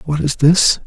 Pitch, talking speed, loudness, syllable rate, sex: 155 Hz, 210 wpm, -14 LUFS, 4.4 syllables/s, male